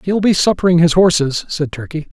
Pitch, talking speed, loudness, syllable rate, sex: 170 Hz, 190 wpm, -14 LUFS, 5.5 syllables/s, male